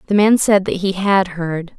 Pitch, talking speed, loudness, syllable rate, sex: 190 Hz, 235 wpm, -16 LUFS, 4.4 syllables/s, female